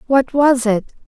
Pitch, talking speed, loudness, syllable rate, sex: 255 Hz, 160 wpm, -16 LUFS, 4.0 syllables/s, female